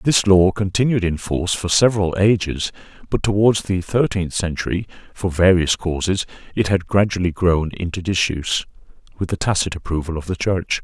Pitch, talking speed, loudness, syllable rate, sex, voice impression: 90 Hz, 160 wpm, -19 LUFS, 5.3 syllables/s, male, masculine, middle-aged, tensed, powerful, hard, cool, intellectual, calm, mature, slightly friendly, reassuring, wild, lively, slightly strict